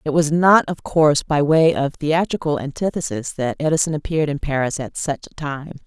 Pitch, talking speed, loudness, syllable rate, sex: 150 Hz, 195 wpm, -19 LUFS, 5.4 syllables/s, female